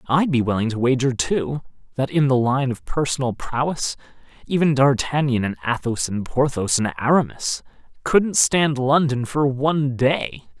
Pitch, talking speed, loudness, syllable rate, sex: 135 Hz, 155 wpm, -20 LUFS, 4.6 syllables/s, male